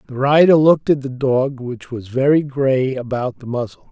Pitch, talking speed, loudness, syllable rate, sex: 130 Hz, 200 wpm, -17 LUFS, 4.8 syllables/s, male